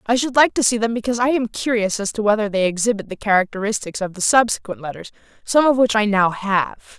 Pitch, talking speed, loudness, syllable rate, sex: 215 Hz, 230 wpm, -19 LUFS, 6.1 syllables/s, female